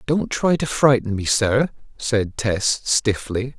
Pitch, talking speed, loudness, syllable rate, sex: 120 Hz, 150 wpm, -20 LUFS, 3.5 syllables/s, male